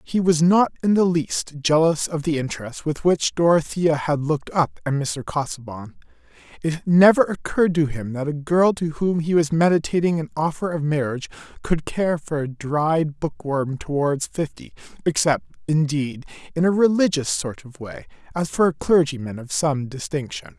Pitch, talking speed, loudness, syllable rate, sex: 155 Hz, 170 wpm, -21 LUFS, 4.8 syllables/s, male